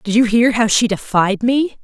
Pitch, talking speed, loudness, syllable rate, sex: 225 Hz, 230 wpm, -15 LUFS, 4.7 syllables/s, female